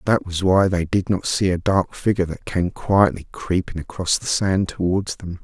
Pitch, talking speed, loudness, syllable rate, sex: 95 Hz, 210 wpm, -21 LUFS, 4.8 syllables/s, male